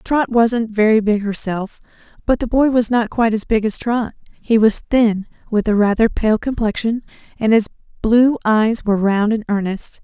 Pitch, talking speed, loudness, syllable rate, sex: 220 Hz, 185 wpm, -17 LUFS, 4.8 syllables/s, female